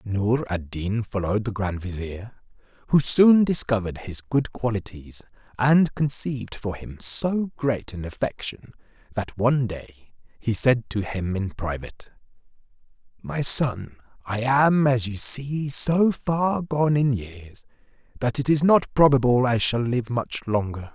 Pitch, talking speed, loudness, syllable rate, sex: 120 Hz, 150 wpm, -23 LUFS, 4.1 syllables/s, male